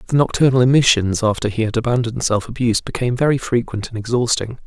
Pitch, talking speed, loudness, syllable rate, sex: 120 Hz, 180 wpm, -18 LUFS, 6.9 syllables/s, male